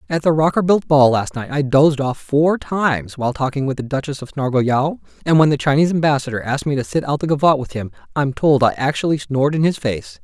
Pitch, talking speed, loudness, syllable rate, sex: 140 Hz, 235 wpm, -18 LUFS, 6.2 syllables/s, male